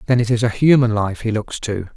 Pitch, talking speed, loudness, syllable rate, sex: 115 Hz, 275 wpm, -18 LUFS, 5.9 syllables/s, male